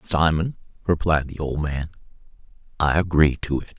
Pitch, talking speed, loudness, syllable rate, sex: 80 Hz, 145 wpm, -23 LUFS, 5.0 syllables/s, male